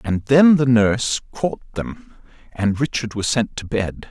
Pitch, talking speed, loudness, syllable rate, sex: 115 Hz, 175 wpm, -19 LUFS, 4.1 syllables/s, male